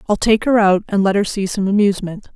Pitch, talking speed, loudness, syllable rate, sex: 200 Hz, 255 wpm, -16 LUFS, 6.1 syllables/s, female